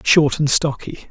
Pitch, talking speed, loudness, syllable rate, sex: 145 Hz, 160 wpm, -17 LUFS, 4.0 syllables/s, male